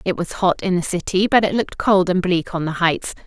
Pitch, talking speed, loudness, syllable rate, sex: 180 Hz, 275 wpm, -19 LUFS, 5.5 syllables/s, female